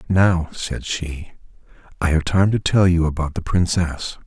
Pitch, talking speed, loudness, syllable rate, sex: 85 Hz, 170 wpm, -20 LUFS, 4.1 syllables/s, male